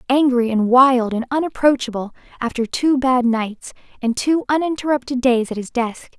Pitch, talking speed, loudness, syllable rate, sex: 255 Hz, 155 wpm, -18 LUFS, 4.9 syllables/s, female